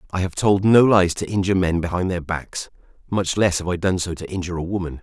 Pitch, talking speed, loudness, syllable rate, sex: 90 Hz, 240 wpm, -20 LUFS, 6.2 syllables/s, male